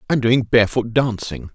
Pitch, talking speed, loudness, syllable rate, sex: 110 Hz, 155 wpm, -18 LUFS, 5.2 syllables/s, male